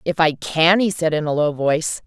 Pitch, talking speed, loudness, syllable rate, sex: 160 Hz, 260 wpm, -18 LUFS, 5.2 syllables/s, female